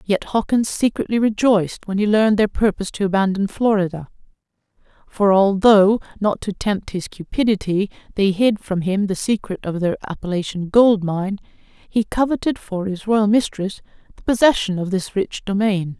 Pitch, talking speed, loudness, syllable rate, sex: 200 Hz, 160 wpm, -19 LUFS, 4.9 syllables/s, female